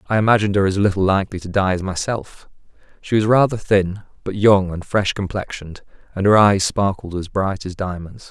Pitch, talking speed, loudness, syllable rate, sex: 100 Hz, 195 wpm, -18 LUFS, 5.6 syllables/s, male